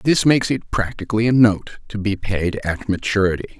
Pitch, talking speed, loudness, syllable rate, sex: 105 Hz, 185 wpm, -19 LUFS, 5.7 syllables/s, male